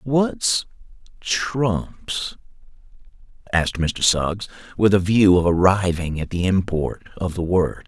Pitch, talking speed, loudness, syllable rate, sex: 95 Hz, 120 wpm, -20 LUFS, 3.5 syllables/s, male